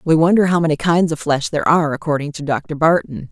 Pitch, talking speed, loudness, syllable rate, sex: 155 Hz, 235 wpm, -17 LUFS, 6.2 syllables/s, female